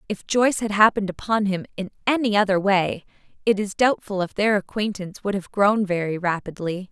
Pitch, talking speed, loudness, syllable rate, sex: 200 Hz, 180 wpm, -22 LUFS, 5.6 syllables/s, female